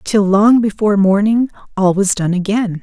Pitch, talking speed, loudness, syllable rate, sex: 205 Hz, 170 wpm, -14 LUFS, 4.7 syllables/s, female